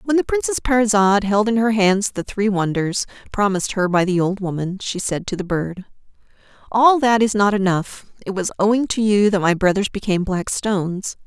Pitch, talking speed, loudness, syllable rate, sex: 205 Hz, 200 wpm, -19 LUFS, 5.3 syllables/s, female